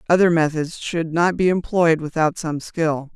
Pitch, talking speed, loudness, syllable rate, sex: 165 Hz, 170 wpm, -20 LUFS, 4.4 syllables/s, female